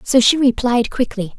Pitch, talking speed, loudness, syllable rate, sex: 245 Hz, 175 wpm, -16 LUFS, 4.8 syllables/s, female